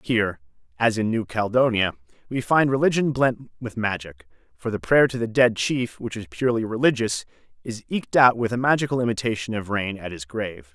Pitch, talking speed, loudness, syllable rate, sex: 115 Hz, 190 wpm, -23 LUFS, 5.6 syllables/s, male